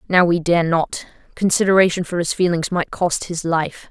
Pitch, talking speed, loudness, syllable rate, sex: 170 Hz, 185 wpm, -18 LUFS, 4.9 syllables/s, female